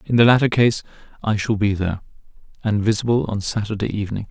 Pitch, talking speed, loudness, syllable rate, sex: 105 Hz, 180 wpm, -20 LUFS, 6.5 syllables/s, male